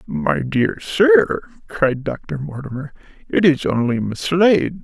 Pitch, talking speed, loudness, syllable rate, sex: 145 Hz, 125 wpm, -18 LUFS, 3.4 syllables/s, male